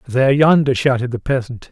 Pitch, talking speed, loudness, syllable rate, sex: 130 Hz, 175 wpm, -16 LUFS, 5.7 syllables/s, male